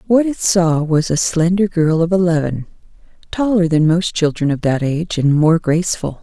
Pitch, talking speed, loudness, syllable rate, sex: 170 Hz, 185 wpm, -16 LUFS, 5.0 syllables/s, female